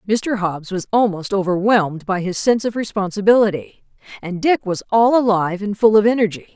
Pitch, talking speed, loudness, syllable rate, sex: 205 Hz, 175 wpm, -17 LUFS, 5.6 syllables/s, female